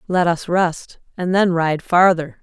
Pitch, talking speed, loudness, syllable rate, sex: 175 Hz, 175 wpm, -17 LUFS, 3.8 syllables/s, female